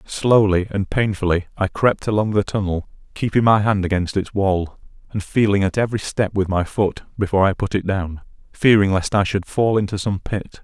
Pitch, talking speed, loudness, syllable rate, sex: 100 Hz, 200 wpm, -19 LUFS, 5.2 syllables/s, male